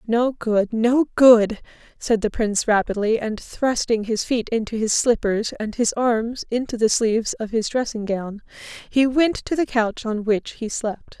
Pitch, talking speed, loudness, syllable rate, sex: 225 Hz, 180 wpm, -21 LUFS, 4.2 syllables/s, female